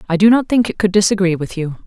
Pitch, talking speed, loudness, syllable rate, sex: 195 Hz, 290 wpm, -15 LUFS, 6.6 syllables/s, female